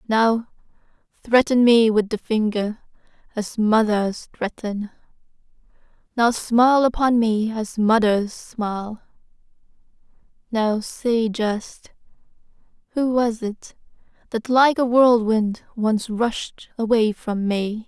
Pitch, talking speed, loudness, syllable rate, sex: 225 Hz, 105 wpm, -20 LUFS, 3.4 syllables/s, female